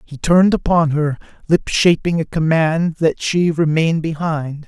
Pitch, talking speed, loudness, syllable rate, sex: 160 Hz, 155 wpm, -16 LUFS, 4.2 syllables/s, male